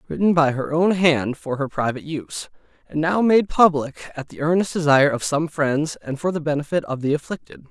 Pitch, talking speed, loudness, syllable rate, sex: 155 Hz, 210 wpm, -20 LUFS, 5.5 syllables/s, male